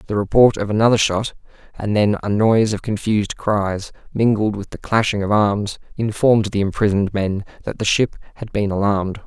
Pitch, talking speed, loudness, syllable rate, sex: 105 Hz, 180 wpm, -19 LUFS, 5.5 syllables/s, male